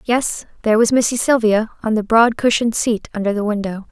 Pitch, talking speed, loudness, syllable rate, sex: 225 Hz, 200 wpm, -17 LUFS, 5.8 syllables/s, female